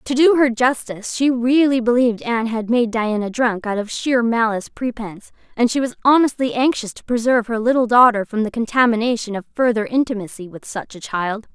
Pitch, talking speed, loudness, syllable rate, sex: 235 Hz, 190 wpm, -18 LUFS, 5.8 syllables/s, female